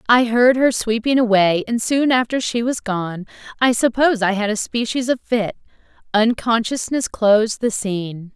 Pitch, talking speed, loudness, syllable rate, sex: 225 Hz, 165 wpm, -18 LUFS, 4.7 syllables/s, female